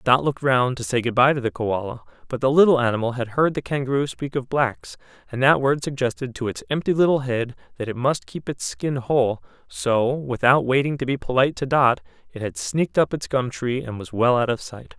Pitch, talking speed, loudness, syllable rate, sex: 130 Hz, 230 wpm, -22 LUFS, 5.6 syllables/s, male